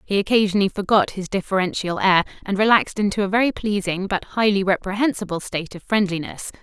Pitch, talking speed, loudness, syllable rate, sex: 200 Hz, 165 wpm, -21 LUFS, 6.3 syllables/s, female